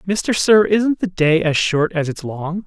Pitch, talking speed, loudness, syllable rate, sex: 175 Hz, 225 wpm, -17 LUFS, 4.3 syllables/s, male